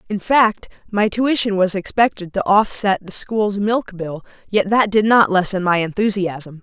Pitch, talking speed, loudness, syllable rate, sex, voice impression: 200 Hz, 170 wpm, -17 LUFS, 4.3 syllables/s, female, very feminine, old, very thin, very tensed, very powerful, very bright, very hard, very clear, fluent, slightly raspy, slightly cool, slightly intellectual, refreshing, slightly sincere, slightly calm, slightly friendly, slightly reassuring, very unique, slightly elegant, wild, very lively, very strict, very intense, very sharp, light